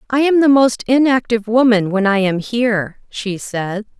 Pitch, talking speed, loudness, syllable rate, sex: 225 Hz, 180 wpm, -15 LUFS, 4.8 syllables/s, female